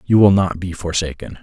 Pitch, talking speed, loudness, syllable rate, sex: 90 Hz, 210 wpm, -17 LUFS, 5.5 syllables/s, male